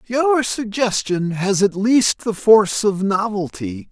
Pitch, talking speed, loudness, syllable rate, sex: 205 Hz, 140 wpm, -18 LUFS, 3.7 syllables/s, male